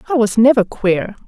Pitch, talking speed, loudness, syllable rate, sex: 225 Hz, 190 wpm, -15 LUFS, 5.1 syllables/s, female